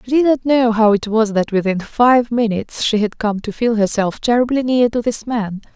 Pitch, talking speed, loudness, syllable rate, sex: 225 Hz, 230 wpm, -16 LUFS, 5.1 syllables/s, female